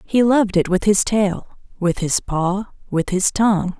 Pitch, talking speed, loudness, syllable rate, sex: 195 Hz, 190 wpm, -18 LUFS, 4.4 syllables/s, female